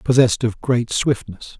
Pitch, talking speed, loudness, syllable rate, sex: 115 Hz, 150 wpm, -19 LUFS, 4.8 syllables/s, male